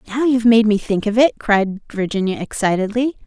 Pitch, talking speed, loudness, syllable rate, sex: 215 Hz, 185 wpm, -17 LUFS, 5.5 syllables/s, female